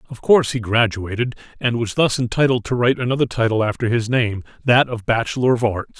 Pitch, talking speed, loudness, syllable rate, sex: 120 Hz, 190 wpm, -19 LUFS, 6.1 syllables/s, male